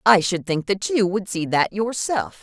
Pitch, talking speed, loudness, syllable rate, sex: 190 Hz, 220 wpm, -21 LUFS, 4.3 syllables/s, female